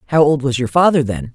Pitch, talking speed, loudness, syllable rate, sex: 135 Hz, 265 wpm, -15 LUFS, 6.3 syllables/s, female